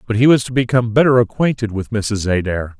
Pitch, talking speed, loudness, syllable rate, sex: 115 Hz, 215 wpm, -16 LUFS, 6.1 syllables/s, male